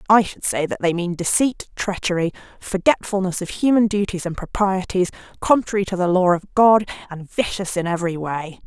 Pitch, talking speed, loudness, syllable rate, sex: 190 Hz, 175 wpm, -20 LUFS, 5.3 syllables/s, female